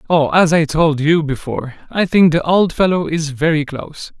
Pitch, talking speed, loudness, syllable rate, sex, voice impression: 160 Hz, 200 wpm, -15 LUFS, 5.0 syllables/s, male, very masculine, adult-like, slightly middle-aged, slightly thick, tensed, slightly weak, very bright, very hard, slightly clear, fluent, slightly raspy, slightly cool, very intellectual, refreshing, very sincere, slightly calm, slightly mature, friendly, reassuring, very unique, elegant, slightly wild, slightly sweet, lively, kind, slightly intense, slightly sharp